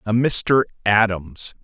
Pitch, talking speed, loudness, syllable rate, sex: 110 Hz, 110 wpm, -19 LUFS, 3.2 syllables/s, male